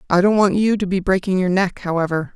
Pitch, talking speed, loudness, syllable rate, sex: 190 Hz, 255 wpm, -18 LUFS, 6.1 syllables/s, female